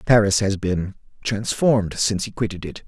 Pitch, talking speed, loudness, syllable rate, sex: 105 Hz, 165 wpm, -21 LUFS, 5.4 syllables/s, male